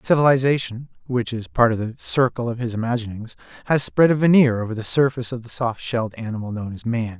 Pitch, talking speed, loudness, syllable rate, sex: 120 Hz, 210 wpm, -21 LUFS, 4.9 syllables/s, male